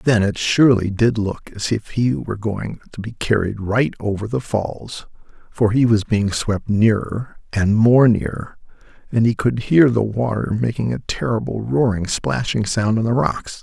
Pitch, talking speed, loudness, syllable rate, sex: 110 Hz, 180 wpm, -19 LUFS, 4.3 syllables/s, male